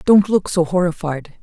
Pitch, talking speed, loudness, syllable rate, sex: 175 Hz, 170 wpm, -17 LUFS, 4.6 syllables/s, female